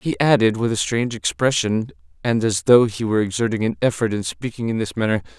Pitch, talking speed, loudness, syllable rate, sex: 115 Hz, 210 wpm, -20 LUFS, 6.0 syllables/s, male